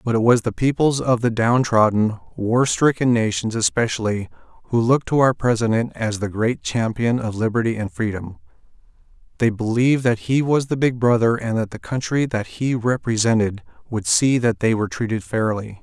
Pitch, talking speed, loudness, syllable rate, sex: 115 Hz, 180 wpm, -20 LUFS, 5.2 syllables/s, male